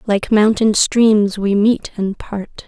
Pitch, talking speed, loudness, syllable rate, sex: 210 Hz, 155 wpm, -15 LUFS, 3.2 syllables/s, female